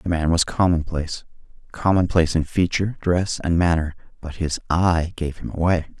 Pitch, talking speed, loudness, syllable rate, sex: 85 Hz, 150 wpm, -21 LUFS, 5.2 syllables/s, male